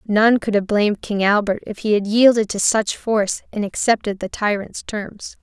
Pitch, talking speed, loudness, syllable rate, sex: 210 Hz, 200 wpm, -19 LUFS, 4.9 syllables/s, female